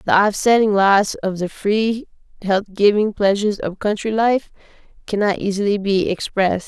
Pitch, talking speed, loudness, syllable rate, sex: 205 Hz, 145 wpm, -18 LUFS, 4.9 syllables/s, female